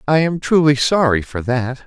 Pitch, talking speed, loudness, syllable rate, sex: 140 Hz, 195 wpm, -16 LUFS, 4.6 syllables/s, male